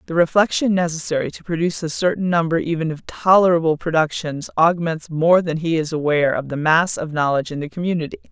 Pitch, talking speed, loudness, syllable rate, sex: 165 Hz, 190 wpm, -19 LUFS, 6.2 syllables/s, female